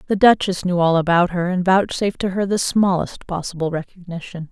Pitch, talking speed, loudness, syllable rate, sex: 180 Hz, 185 wpm, -19 LUFS, 5.5 syllables/s, female